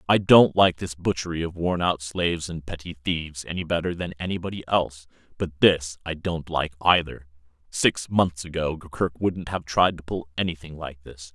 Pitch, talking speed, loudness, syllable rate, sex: 80 Hz, 185 wpm, -24 LUFS, 5.1 syllables/s, male